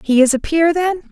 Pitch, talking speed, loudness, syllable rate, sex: 310 Hz, 270 wpm, -15 LUFS, 5.3 syllables/s, female